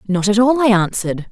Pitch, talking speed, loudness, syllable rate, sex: 210 Hz, 230 wpm, -15 LUFS, 6.3 syllables/s, female